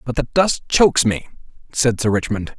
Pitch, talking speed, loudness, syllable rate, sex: 125 Hz, 185 wpm, -18 LUFS, 5.0 syllables/s, male